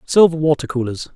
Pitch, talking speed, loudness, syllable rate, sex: 150 Hz, 155 wpm, -17 LUFS, 5.7 syllables/s, male